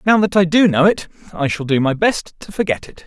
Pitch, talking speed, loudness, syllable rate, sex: 170 Hz, 275 wpm, -16 LUFS, 5.5 syllables/s, male